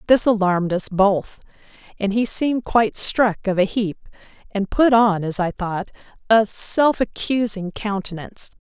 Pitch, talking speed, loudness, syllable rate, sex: 205 Hz, 155 wpm, -20 LUFS, 4.5 syllables/s, female